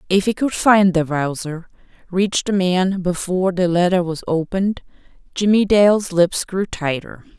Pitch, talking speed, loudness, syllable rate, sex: 185 Hz, 145 wpm, -18 LUFS, 4.6 syllables/s, female